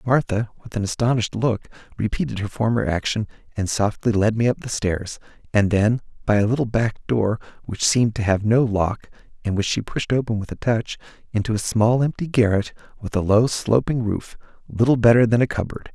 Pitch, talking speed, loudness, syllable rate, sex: 110 Hz, 195 wpm, -21 LUFS, 5.4 syllables/s, male